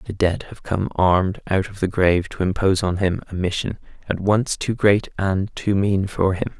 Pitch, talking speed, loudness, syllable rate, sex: 95 Hz, 220 wpm, -21 LUFS, 5.0 syllables/s, male